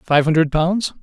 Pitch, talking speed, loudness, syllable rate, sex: 165 Hz, 175 wpm, -17 LUFS, 4.4 syllables/s, male